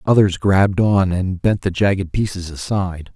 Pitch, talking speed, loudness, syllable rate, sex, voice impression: 95 Hz, 170 wpm, -18 LUFS, 5.0 syllables/s, male, masculine, adult-like, slightly refreshing, sincere, slightly calm